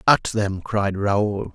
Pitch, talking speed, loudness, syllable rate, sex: 105 Hz, 155 wpm, -22 LUFS, 2.9 syllables/s, male